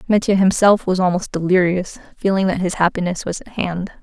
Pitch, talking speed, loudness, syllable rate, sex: 185 Hz, 180 wpm, -18 LUFS, 5.5 syllables/s, female